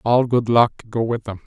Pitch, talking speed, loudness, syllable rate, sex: 115 Hz, 245 wpm, -19 LUFS, 4.7 syllables/s, male